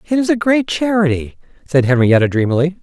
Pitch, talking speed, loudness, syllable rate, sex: 170 Hz, 170 wpm, -15 LUFS, 5.8 syllables/s, male